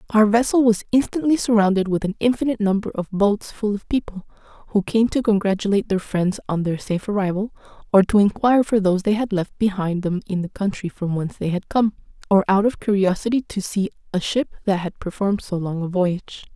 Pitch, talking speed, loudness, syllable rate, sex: 200 Hz, 205 wpm, -21 LUFS, 6.0 syllables/s, female